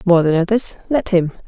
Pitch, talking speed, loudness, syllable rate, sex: 190 Hz, 160 wpm, -17 LUFS, 5.2 syllables/s, female